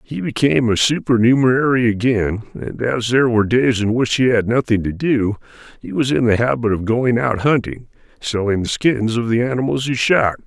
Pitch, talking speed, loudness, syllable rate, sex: 120 Hz, 195 wpm, -17 LUFS, 5.3 syllables/s, male